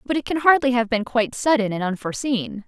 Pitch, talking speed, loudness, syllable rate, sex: 240 Hz, 225 wpm, -21 LUFS, 6.2 syllables/s, female